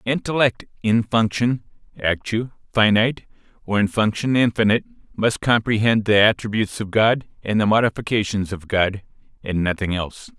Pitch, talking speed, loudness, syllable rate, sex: 105 Hz, 135 wpm, -20 LUFS, 5.4 syllables/s, male